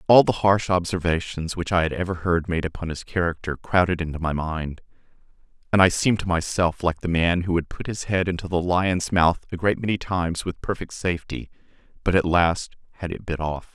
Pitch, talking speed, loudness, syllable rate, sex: 90 Hz, 210 wpm, -23 LUFS, 5.5 syllables/s, male